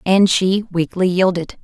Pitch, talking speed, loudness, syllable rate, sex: 185 Hz, 145 wpm, -16 LUFS, 4.1 syllables/s, female